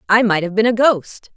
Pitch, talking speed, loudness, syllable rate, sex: 210 Hz, 265 wpm, -16 LUFS, 5.2 syllables/s, female